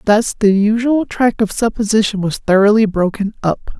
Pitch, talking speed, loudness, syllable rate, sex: 210 Hz, 160 wpm, -15 LUFS, 5.1 syllables/s, female